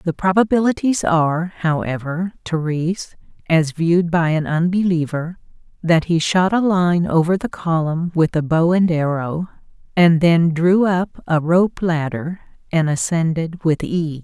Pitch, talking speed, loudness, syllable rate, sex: 170 Hz, 145 wpm, -18 LUFS, 4.3 syllables/s, female